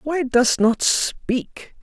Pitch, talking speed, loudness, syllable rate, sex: 260 Hz, 130 wpm, -19 LUFS, 2.4 syllables/s, female